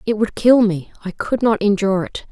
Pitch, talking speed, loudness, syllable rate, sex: 205 Hz, 235 wpm, -17 LUFS, 5.4 syllables/s, female